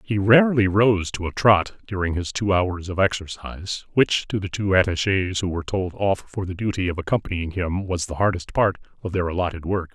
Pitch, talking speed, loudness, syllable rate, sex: 95 Hz, 210 wpm, -22 LUFS, 5.5 syllables/s, male